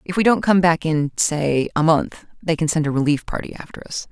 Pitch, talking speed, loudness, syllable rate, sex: 160 Hz, 220 wpm, -19 LUFS, 5.4 syllables/s, female